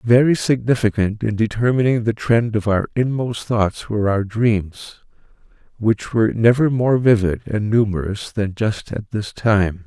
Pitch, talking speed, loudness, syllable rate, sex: 110 Hz, 150 wpm, -19 LUFS, 4.4 syllables/s, male